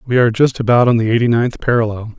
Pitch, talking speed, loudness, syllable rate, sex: 115 Hz, 250 wpm, -14 LUFS, 6.8 syllables/s, male